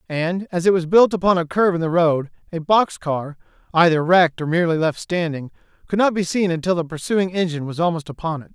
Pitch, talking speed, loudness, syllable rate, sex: 170 Hz, 210 wpm, -19 LUFS, 6.1 syllables/s, male